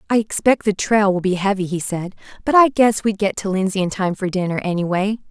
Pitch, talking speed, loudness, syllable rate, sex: 200 Hz, 235 wpm, -19 LUFS, 5.7 syllables/s, female